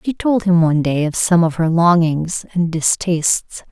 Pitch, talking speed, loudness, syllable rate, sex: 170 Hz, 195 wpm, -16 LUFS, 4.6 syllables/s, female